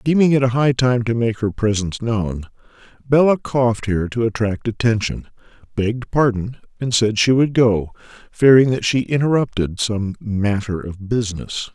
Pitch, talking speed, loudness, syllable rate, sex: 115 Hz, 155 wpm, -18 LUFS, 4.9 syllables/s, male